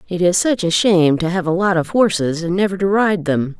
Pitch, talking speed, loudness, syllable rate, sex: 180 Hz, 265 wpm, -16 LUFS, 5.5 syllables/s, female